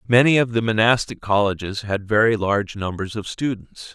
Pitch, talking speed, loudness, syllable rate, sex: 110 Hz, 165 wpm, -20 LUFS, 5.2 syllables/s, male